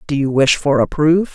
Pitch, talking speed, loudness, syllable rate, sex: 145 Hz, 270 wpm, -15 LUFS, 5.0 syllables/s, female